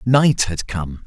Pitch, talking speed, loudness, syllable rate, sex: 105 Hz, 170 wpm, -19 LUFS, 3.1 syllables/s, male